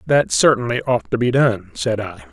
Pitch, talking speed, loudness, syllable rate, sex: 120 Hz, 205 wpm, -18 LUFS, 4.9 syllables/s, male